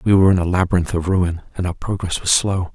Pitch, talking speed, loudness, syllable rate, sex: 90 Hz, 265 wpm, -18 LUFS, 6.4 syllables/s, male